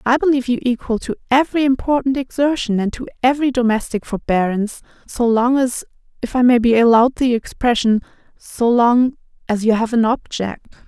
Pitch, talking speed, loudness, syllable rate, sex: 245 Hz, 155 wpm, -17 LUFS, 5.7 syllables/s, female